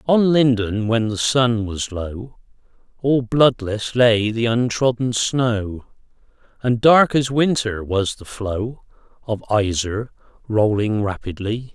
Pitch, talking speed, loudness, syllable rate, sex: 115 Hz, 125 wpm, -19 LUFS, 3.5 syllables/s, male